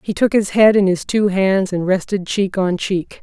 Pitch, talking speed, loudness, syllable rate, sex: 195 Hz, 240 wpm, -16 LUFS, 4.5 syllables/s, female